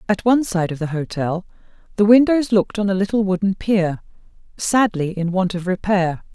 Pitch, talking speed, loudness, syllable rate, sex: 195 Hz, 180 wpm, -19 LUFS, 5.4 syllables/s, female